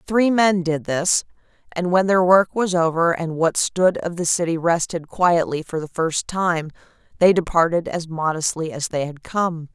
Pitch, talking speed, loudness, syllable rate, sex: 170 Hz, 185 wpm, -20 LUFS, 4.4 syllables/s, female